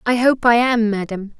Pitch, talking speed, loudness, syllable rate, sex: 230 Hz, 215 wpm, -16 LUFS, 4.8 syllables/s, female